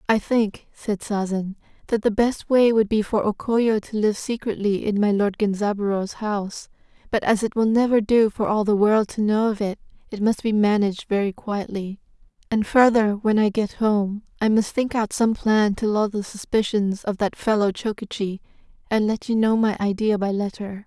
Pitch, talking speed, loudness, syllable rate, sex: 210 Hz, 200 wpm, -22 LUFS, 4.9 syllables/s, female